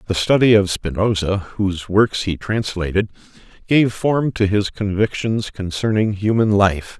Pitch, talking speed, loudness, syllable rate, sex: 100 Hz, 135 wpm, -18 LUFS, 3.8 syllables/s, male